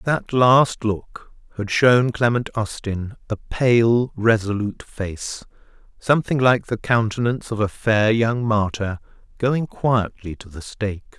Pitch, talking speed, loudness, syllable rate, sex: 115 Hz, 135 wpm, -20 LUFS, 3.9 syllables/s, male